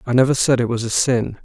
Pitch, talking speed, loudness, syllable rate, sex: 125 Hz, 290 wpm, -18 LUFS, 6.3 syllables/s, male